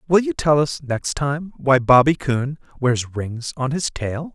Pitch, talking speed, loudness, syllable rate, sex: 140 Hz, 195 wpm, -20 LUFS, 3.8 syllables/s, male